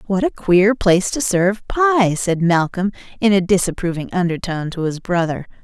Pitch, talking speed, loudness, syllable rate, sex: 190 Hz, 170 wpm, -18 LUFS, 5.6 syllables/s, female